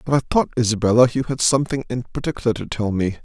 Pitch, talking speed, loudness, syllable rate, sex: 120 Hz, 220 wpm, -20 LUFS, 7.1 syllables/s, male